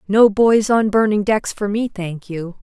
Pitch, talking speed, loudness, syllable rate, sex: 205 Hz, 205 wpm, -17 LUFS, 4.1 syllables/s, female